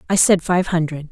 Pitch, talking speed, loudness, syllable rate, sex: 170 Hz, 215 wpm, -17 LUFS, 5.4 syllables/s, female